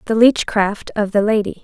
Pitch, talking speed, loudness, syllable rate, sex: 215 Hz, 185 wpm, -17 LUFS, 5.2 syllables/s, female